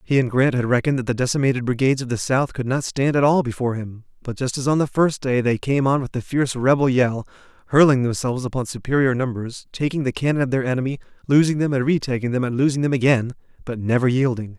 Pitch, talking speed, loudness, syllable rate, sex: 130 Hz, 235 wpm, -20 LUFS, 6.6 syllables/s, male